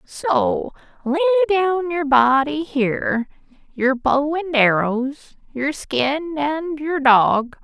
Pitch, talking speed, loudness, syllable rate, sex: 280 Hz, 120 wpm, -19 LUFS, 3.4 syllables/s, female